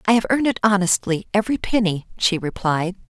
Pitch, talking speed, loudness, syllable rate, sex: 195 Hz, 170 wpm, -20 LUFS, 6.2 syllables/s, female